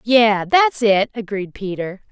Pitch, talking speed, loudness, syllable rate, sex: 215 Hz, 140 wpm, -18 LUFS, 3.8 syllables/s, female